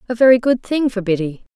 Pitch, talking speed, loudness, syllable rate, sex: 225 Hz, 230 wpm, -17 LUFS, 6.2 syllables/s, female